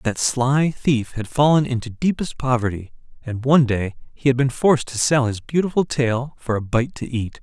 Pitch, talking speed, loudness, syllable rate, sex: 130 Hz, 200 wpm, -20 LUFS, 5.0 syllables/s, male